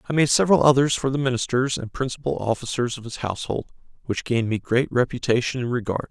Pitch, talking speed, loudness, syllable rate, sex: 125 Hz, 195 wpm, -22 LUFS, 6.6 syllables/s, male